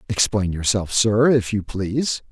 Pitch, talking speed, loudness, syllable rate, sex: 105 Hz, 155 wpm, -20 LUFS, 4.3 syllables/s, male